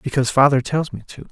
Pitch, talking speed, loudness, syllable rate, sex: 140 Hz, 230 wpm, -18 LUFS, 6.6 syllables/s, male